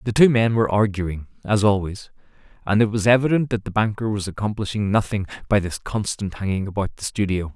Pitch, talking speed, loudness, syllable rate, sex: 105 Hz, 190 wpm, -21 LUFS, 5.9 syllables/s, male